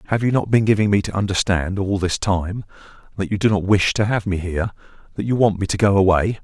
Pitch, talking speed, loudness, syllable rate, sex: 100 Hz, 240 wpm, -19 LUFS, 6.1 syllables/s, male